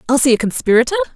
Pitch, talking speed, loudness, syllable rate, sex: 280 Hz, 155 wpm, -15 LUFS, 8.8 syllables/s, female